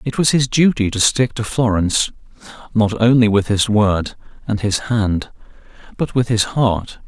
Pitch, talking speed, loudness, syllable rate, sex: 110 Hz, 170 wpm, -17 LUFS, 4.5 syllables/s, male